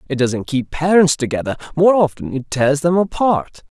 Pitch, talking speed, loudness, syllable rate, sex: 150 Hz, 175 wpm, -17 LUFS, 4.9 syllables/s, male